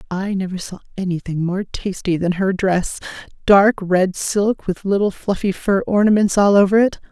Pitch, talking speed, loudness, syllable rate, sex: 195 Hz, 160 wpm, -18 LUFS, 4.7 syllables/s, female